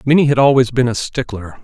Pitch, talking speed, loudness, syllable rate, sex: 130 Hz, 220 wpm, -14 LUFS, 5.9 syllables/s, male